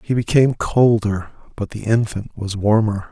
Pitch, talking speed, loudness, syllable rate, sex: 110 Hz, 155 wpm, -18 LUFS, 4.7 syllables/s, male